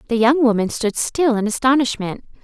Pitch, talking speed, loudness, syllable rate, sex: 240 Hz, 170 wpm, -18 LUFS, 5.3 syllables/s, female